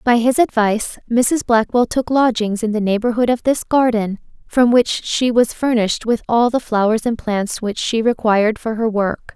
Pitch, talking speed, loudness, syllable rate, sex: 230 Hz, 190 wpm, -17 LUFS, 4.8 syllables/s, female